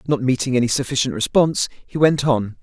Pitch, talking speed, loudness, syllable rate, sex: 130 Hz, 185 wpm, -19 LUFS, 5.8 syllables/s, male